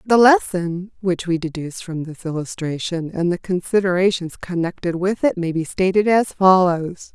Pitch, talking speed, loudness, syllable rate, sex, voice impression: 180 Hz, 160 wpm, -19 LUFS, 4.9 syllables/s, female, feminine, adult-like, slightly sincere, calm, slightly elegant